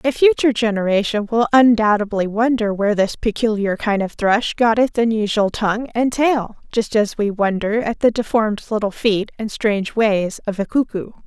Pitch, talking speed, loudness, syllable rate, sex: 220 Hz, 175 wpm, -18 LUFS, 5.1 syllables/s, female